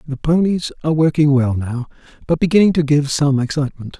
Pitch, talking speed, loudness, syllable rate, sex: 145 Hz, 180 wpm, -17 LUFS, 6.0 syllables/s, male